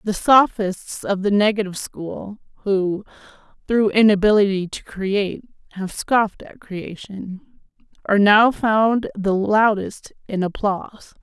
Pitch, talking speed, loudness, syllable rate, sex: 205 Hz, 120 wpm, -19 LUFS, 4.1 syllables/s, female